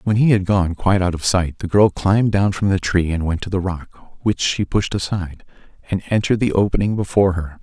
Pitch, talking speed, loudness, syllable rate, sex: 95 Hz, 235 wpm, -18 LUFS, 5.7 syllables/s, male